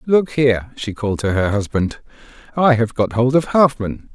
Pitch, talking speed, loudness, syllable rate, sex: 120 Hz, 190 wpm, -18 LUFS, 4.9 syllables/s, male